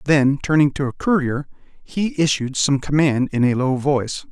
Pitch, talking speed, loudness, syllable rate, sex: 140 Hz, 180 wpm, -19 LUFS, 4.8 syllables/s, male